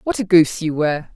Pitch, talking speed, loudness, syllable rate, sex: 170 Hz, 260 wpm, -17 LUFS, 6.9 syllables/s, female